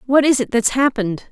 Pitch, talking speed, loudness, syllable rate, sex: 250 Hz, 230 wpm, -17 LUFS, 6.0 syllables/s, female